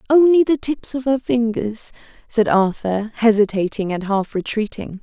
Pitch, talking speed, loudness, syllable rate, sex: 225 Hz, 145 wpm, -19 LUFS, 4.5 syllables/s, female